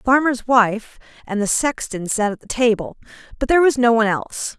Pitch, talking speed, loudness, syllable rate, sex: 230 Hz, 210 wpm, -18 LUFS, 5.8 syllables/s, female